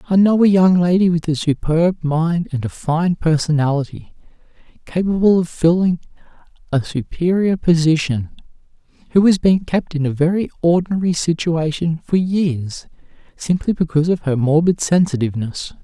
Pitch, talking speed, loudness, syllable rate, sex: 165 Hz, 135 wpm, -17 LUFS, 4.9 syllables/s, male